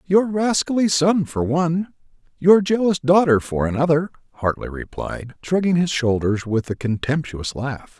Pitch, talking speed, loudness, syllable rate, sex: 155 Hz, 135 wpm, -20 LUFS, 4.5 syllables/s, male